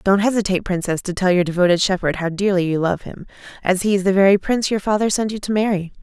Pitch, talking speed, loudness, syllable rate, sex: 190 Hz, 250 wpm, -18 LUFS, 6.8 syllables/s, female